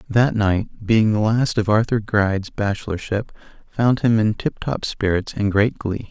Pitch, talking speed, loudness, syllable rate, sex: 105 Hz, 165 wpm, -20 LUFS, 4.3 syllables/s, male